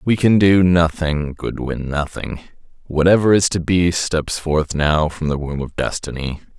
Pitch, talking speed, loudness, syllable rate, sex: 80 Hz, 155 wpm, -18 LUFS, 4.2 syllables/s, male